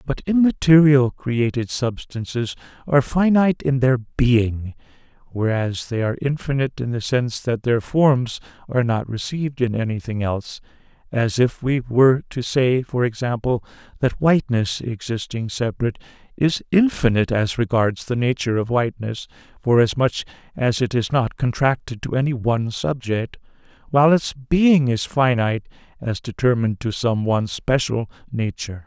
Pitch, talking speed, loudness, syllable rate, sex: 125 Hz, 140 wpm, -20 LUFS, 5.1 syllables/s, male